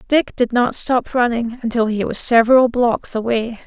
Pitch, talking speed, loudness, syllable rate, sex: 240 Hz, 180 wpm, -17 LUFS, 4.7 syllables/s, female